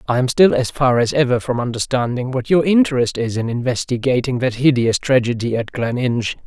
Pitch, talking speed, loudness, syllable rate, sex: 130 Hz, 185 wpm, -17 LUFS, 5.5 syllables/s, female